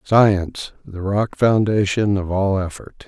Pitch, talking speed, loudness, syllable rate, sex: 100 Hz, 115 wpm, -19 LUFS, 3.8 syllables/s, male